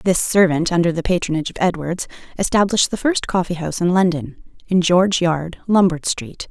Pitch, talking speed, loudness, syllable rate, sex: 175 Hz, 175 wpm, -18 LUFS, 5.7 syllables/s, female